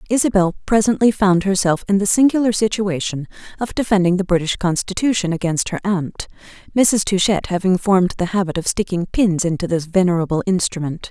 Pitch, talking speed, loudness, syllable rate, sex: 190 Hz, 155 wpm, -18 LUFS, 5.6 syllables/s, female